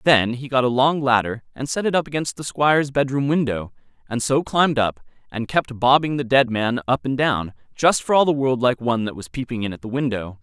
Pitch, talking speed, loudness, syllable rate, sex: 130 Hz, 240 wpm, -20 LUFS, 5.6 syllables/s, male